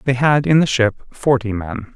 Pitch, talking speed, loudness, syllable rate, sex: 125 Hz, 215 wpm, -17 LUFS, 4.4 syllables/s, male